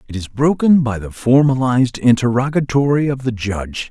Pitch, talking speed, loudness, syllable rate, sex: 125 Hz, 155 wpm, -16 LUFS, 5.4 syllables/s, male